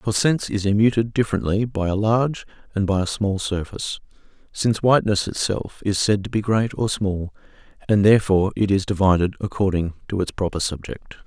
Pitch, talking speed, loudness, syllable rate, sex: 100 Hz, 175 wpm, -21 LUFS, 5.8 syllables/s, male